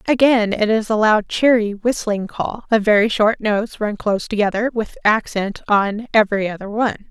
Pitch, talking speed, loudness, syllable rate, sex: 215 Hz, 175 wpm, -18 LUFS, 5.2 syllables/s, female